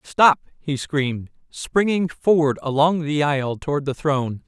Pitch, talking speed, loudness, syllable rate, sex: 145 Hz, 150 wpm, -21 LUFS, 4.5 syllables/s, male